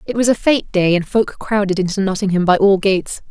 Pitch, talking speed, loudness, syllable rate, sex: 195 Hz, 235 wpm, -16 LUFS, 6.1 syllables/s, female